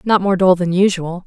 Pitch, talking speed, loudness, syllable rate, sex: 185 Hz, 235 wpm, -15 LUFS, 5.1 syllables/s, female